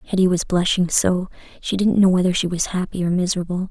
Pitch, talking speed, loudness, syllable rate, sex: 180 Hz, 210 wpm, -19 LUFS, 6.2 syllables/s, female